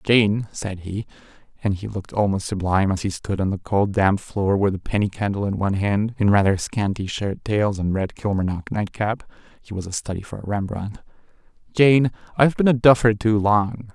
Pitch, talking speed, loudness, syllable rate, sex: 105 Hz, 200 wpm, -21 LUFS, 5.2 syllables/s, male